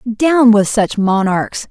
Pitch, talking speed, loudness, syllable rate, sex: 220 Hz, 140 wpm, -13 LUFS, 3.1 syllables/s, female